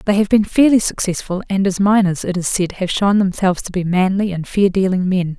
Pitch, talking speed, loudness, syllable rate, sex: 190 Hz, 235 wpm, -16 LUFS, 5.6 syllables/s, female